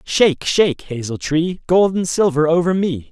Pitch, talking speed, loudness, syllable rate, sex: 165 Hz, 175 wpm, -17 LUFS, 4.8 syllables/s, male